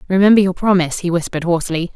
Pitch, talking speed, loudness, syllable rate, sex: 180 Hz, 185 wpm, -16 LUFS, 8.0 syllables/s, female